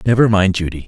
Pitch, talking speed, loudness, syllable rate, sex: 100 Hz, 205 wpm, -15 LUFS, 6.7 syllables/s, male